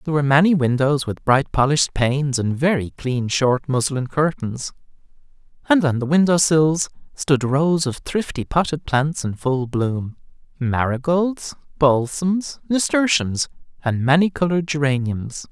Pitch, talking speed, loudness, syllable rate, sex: 145 Hz, 130 wpm, -20 LUFS, 4.4 syllables/s, male